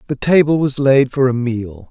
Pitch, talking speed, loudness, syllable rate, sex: 130 Hz, 220 wpm, -15 LUFS, 4.7 syllables/s, male